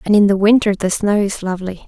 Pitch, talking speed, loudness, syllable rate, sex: 200 Hz, 255 wpm, -15 LUFS, 6.2 syllables/s, female